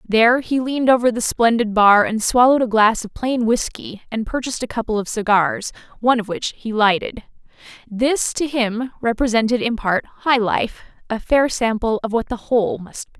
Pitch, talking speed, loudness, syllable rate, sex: 225 Hz, 185 wpm, -18 LUFS, 5.1 syllables/s, female